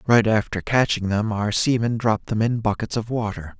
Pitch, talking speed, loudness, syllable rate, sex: 110 Hz, 200 wpm, -22 LUFS, 5.2 syllables/s, male